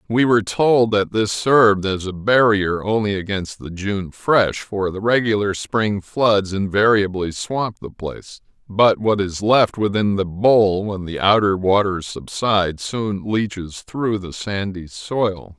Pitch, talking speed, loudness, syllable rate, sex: 105 Hz, 160 wpm, -19 LUFS, 3.9 syllables/s, male